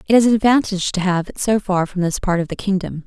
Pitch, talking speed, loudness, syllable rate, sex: 195 Hz, 295 wpm, -18 LUFS, 6.6 syllables/s, female